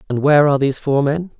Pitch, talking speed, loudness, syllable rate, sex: 145 Hz, 260 wpm, -16 LUFS, 7.9 syllables/s, male